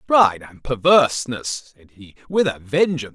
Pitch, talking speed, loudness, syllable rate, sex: 125 Hz, 155 wpm, -19 LUFS, 5.3 syllables/s, male